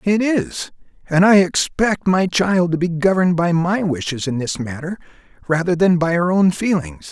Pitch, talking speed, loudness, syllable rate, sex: 175 Hz, 185 wpm, -17 LUFS, 4.7 syllables/s, male